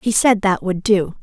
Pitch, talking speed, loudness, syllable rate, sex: 200 Hz, 245 wpm, -17 LUFS, 4.6 syllables/s, female